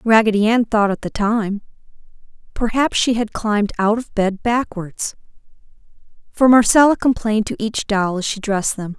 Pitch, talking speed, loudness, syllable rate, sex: 215 Hz, 160 wpm, -18 LUFS, 5.0 syllables/s, female